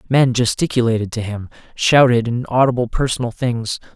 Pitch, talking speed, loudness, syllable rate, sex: 120 Hz, 120 wpm, -17 LUFS, 5.3 syllables/s, male